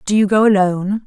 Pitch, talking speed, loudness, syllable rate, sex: 200 Hz, 225 wpm, -15 LUFS, 6.2 syllables/s, female